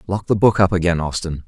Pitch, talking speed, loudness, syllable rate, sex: 90 Hz, 245 wpm, -18 LUFS, 6.0 syllables/s, male